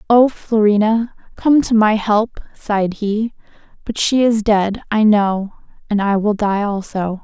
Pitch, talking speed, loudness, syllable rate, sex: 215 Hz, 160 wpm, -16 LUFS, 4.0 syllables/s, female